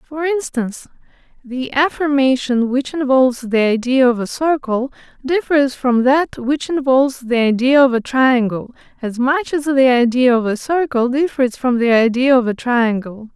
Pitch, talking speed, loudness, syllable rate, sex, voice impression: 260 Hz, 160 wpm, -16 LUFS, 4.6 syllables/s, female, very feminine, slightly young, slightly adult-like, very thin, tensed, slightly weak, slightly bright, hard, clear, fluent, cute, slightly cool, intellectual, very refreshing, sincere, very calm, very friendly, reassuring, unique, elegant, very sweet, lively, kind, slightly sharp, slightly modest